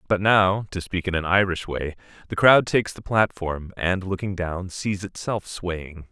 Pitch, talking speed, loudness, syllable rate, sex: 95 Hz, 185 wpm, -23 LUFS, 4.4 syllables/s, male